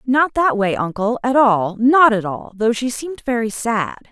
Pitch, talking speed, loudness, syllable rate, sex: 230 Hz, 205 wpm, -17 LUFS, 4.5 syllables/s, female